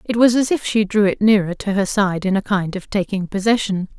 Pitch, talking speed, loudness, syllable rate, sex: 200 Hz, 255 wpm, -18 LUFS, 5.5 syllables/s, female